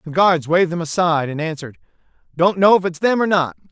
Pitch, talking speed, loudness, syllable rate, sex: 170 Hz, 225 wpm, -17 LUFS, 6.5 syllables/s, male